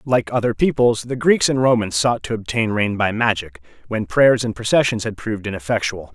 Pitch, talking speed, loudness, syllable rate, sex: 110 Hz, 195 wpm, -19 LUFS, 5.4 syllables/s, male